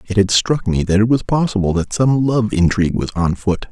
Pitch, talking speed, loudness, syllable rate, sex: 105 Hz, 240 wpm, -16 LUFS, 5.4 syllables/s, male